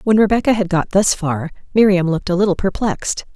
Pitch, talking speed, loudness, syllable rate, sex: 190 Hz, 195 wpm, -17 LUFS, 6.1 syllables/s, female